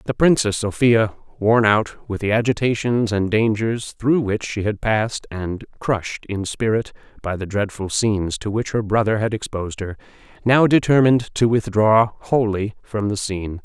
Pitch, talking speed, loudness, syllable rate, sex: 110 Hz, 165 wpm, -20 LUFS, 4.8 syllables/s, male